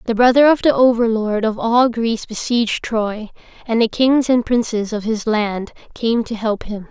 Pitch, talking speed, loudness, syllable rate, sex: 230 Hz, 190 wpm, -17 LUFS, 4.7 syllables/s, female